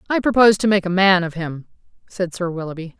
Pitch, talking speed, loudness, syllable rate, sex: 185 Hz, 220 wpm, -18 LUFS, 6.2 syllables/s, female